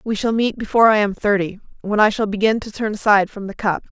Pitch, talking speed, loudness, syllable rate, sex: 210 Hz, 255 wpm, -18 LUFS, 6.4 syllables/s, female